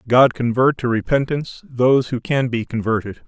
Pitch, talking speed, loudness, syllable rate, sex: 125 Hz, 165 wpm, -19 LUFS, 5.2 syllables/s, male